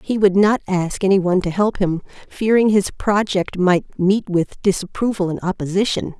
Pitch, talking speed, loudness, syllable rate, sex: 190 Hz, 175 wpm, -18 LUFS, 5.1 syllables/s, female